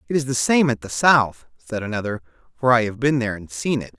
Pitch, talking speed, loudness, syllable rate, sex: 120 Hz, 255 wpm, -20 LUFS, 6.0 syllables/s, male